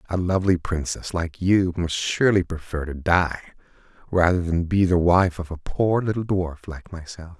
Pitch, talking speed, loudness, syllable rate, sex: 90 Hz, 180 wpm, -22 LUFS, 4.9 syllables/s, male